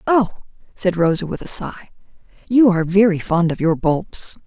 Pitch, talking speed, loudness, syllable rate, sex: 185 Hz, 175 wpm, -18 LUFS, 4.9 syllables/s, female